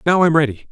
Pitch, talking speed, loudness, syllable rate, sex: 155 Hz, 250 wpm, -15 LUFS, 6.8 syllables/s, male